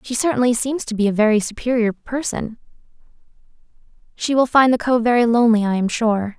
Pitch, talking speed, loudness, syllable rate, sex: 235 Hz, 180 wpm, -18 LUFS, 5.9 syllables/s, female